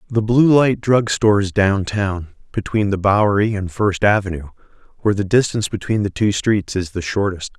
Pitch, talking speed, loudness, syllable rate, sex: 100 Hz, 180 wpm, -18 LUFS, 5.3 syllables/s, male